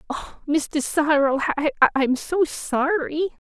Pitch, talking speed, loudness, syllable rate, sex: 300 Hz, 85 wpm, -22 LUFS, 3.3 syllables/s, female